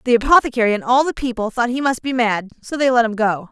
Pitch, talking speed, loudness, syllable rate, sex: 240 Hz, 275 wpm, -17 LUFS, 6.4 syllables/s, female